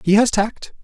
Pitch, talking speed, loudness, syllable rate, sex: 215 Hz, 215 wpm, -18 LUFS, 4.5 syllables/s, male